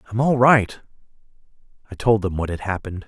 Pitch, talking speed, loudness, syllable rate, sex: 105 Hz, 175 wpm, -20 LUFS, 6.2 syllables/s, male